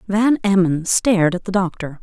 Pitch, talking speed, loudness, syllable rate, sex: 190 Hz, 180 wpm, -17 LUFS, 4.9 syllables/s, female